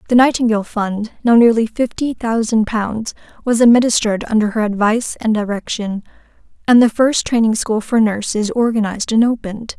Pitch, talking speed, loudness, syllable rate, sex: 225 Hz, 155 wpm, -16 LUFS, 5.5 syllables/s, female